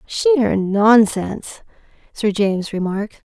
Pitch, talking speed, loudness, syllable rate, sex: 200 Hz, 90 wpm, -17 LUFS, 3.5 syllables/s, female